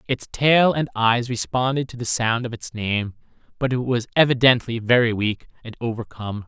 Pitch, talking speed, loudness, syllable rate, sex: 120 Hz, 175 wpm, -21 LUFS, 5.0 syllables/s, male